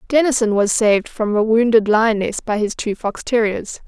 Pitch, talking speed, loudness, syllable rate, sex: 220 Hz, 185 wpm, -17 LUFS, 4.9 syllables/s, female